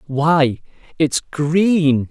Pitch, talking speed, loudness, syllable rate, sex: 150 Hz, 85 wpm, -17 LUFS, 1.9 syllables/s, male